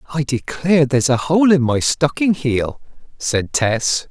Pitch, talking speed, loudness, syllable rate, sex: 140 Hz, 160 wpm, -17 LUFS, 4.3 syllables/s, male